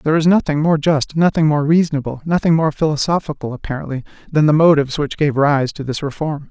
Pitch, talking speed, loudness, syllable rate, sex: 150 Hz, 195 wpm, -17 LUFS, 6.2 syllables/s, male